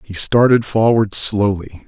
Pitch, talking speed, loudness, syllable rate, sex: 105 Hz, 130 wpm, -15 LUFS, 4.0 syllables/s, male